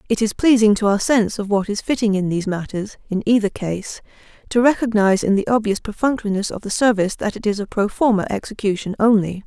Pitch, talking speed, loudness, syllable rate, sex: 210 Hz, 210 wpm, -19 LUFS, 6.2 syllables/s, female